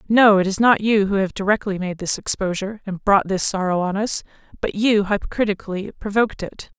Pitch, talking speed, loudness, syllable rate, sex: 200 Hz, 195 wpm, -20 LUFS, 5.8 syllables/s, female